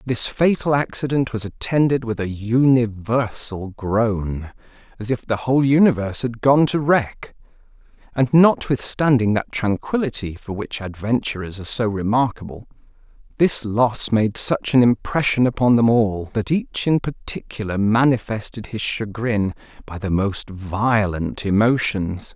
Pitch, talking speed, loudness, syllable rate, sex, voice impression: 115 Hz, 130 wpm, -20 LUFS, 4.4 syllables/s, male, masculine, adult-like, tensed, powerful, slightly bright, clear, cool, intellectual, calm, mature, slightly friendly, wild, lively, slightly intense